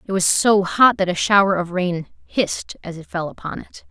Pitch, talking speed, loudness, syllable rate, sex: 185 Hz, 230 wpm, -18 LUFS, 5.0 syllables/s, female